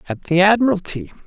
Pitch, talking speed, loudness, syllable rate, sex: 180 Hz, 145 wpm, -16 LUFS, 6.1 syllables/s, male